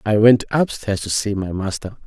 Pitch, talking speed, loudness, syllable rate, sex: 105 Hz, 205 wpm, -19 LUFS, 4.9 syllables/s, male